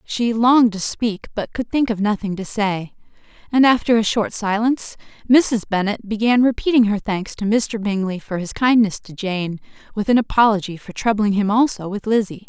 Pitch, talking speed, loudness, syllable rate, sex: 215 Hz, 190 wpm, -19 LUFS, 5.1 syllables/s, female